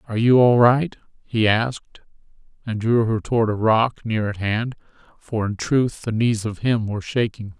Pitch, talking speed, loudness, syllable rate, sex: 115 Hz, 180 wpm, -20 LUFS, 4.8 syllables/s, male